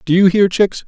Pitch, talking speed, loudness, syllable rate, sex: 190 Hz, 275 wpm, -13 LUFS, 5.3 syllables/s, male